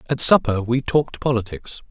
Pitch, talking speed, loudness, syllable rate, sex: 125 Hz, 155 wpm, -19 LUFS, 5.5 syllables/s, male